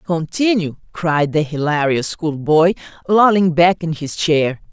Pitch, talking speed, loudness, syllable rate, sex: 165 Hz, 125 wpm, -16 LUFS, 3.9 syllables/s, female